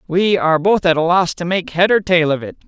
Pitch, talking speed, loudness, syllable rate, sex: 175 Hz, 290 wpm, -15 LUFS, 5.7 syllables/s, male